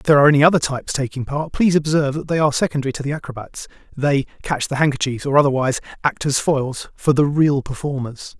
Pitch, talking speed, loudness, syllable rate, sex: 140 Hz, 205 wpm, -19 LUFS, 6.8 syllables/s, male